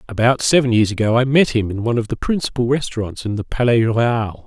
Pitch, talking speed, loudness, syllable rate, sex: 115 Hz, 230 wpm, -18 LUFS, 6.3 syllables/s, male